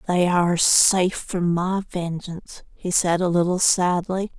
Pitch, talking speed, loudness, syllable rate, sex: 180 Hz, 150 wpm, -20 LUFS, 4.3 syllables/s, female